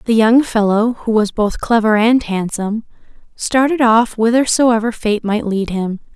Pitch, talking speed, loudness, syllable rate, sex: 225 Hz, 155 wpm, -15 LUFS, 4.4 syllables/s, female